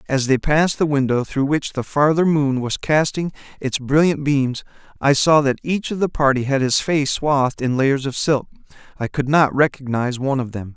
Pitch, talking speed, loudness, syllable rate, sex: 140 Hz, 200 wpm, -19 LUFS, 5.1 syllables/s, male